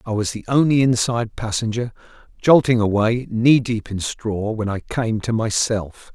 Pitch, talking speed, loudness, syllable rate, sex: 115 Hz, 165 wpm, -19 LUFS, 4.5 syllables/s, male